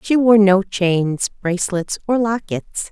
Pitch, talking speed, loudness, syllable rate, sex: 200 Hz, 145 wpm, -17 LUFS, 3.8 syllables/s, female